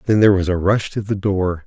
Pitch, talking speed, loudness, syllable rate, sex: 100 Hz, 290 wpm, -18 LUFS, 6.0 syllables/s, male